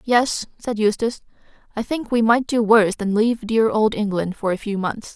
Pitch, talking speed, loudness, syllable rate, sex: 220 Hz, 210 wpm, -20 LUFS, 5.3 syllables/s, female